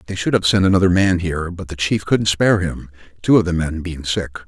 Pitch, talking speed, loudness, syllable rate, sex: 90 Hz, 255 wpm, -18 LUFS, 6.1 syllables/s, male